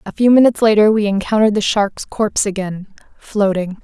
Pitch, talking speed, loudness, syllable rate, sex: 205 Hz, 170 wpm, -15 LUFS, 5.9 syllables/s, female